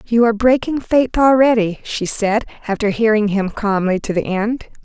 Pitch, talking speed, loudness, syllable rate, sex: 220 Hz, 175 wpm, -16 LUFS, 4.8 syllables/s, female